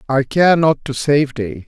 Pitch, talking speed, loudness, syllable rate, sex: 135 Hz, 215 wpm, -16 LUFS, 4.0 syllables/s, male